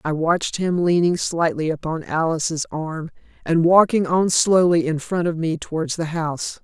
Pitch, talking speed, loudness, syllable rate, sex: 165 Hz, 170 wpm, -20 LUFS, 4.7 syllables/s, female